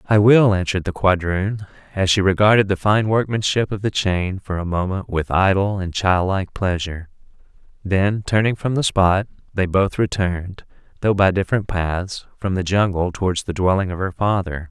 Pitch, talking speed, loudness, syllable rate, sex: 95 Hz, 175 wpm, -19 LUFS, 5.1 syllables/s, male